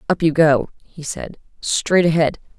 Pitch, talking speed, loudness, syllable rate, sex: 160 Hz, 165 wpm, -18 LUFS, 4.2 syllables/s, female